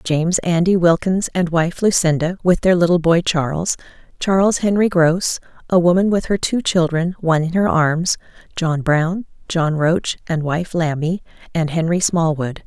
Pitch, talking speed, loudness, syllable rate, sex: 170 Hz, 150 wpm, -18 LUFS, 4.6 syllables/s, female